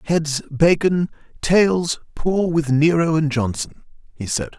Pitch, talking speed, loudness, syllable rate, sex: 160 Hz, 105 wpm, -19 LUFS, 3.8 syllables/s, male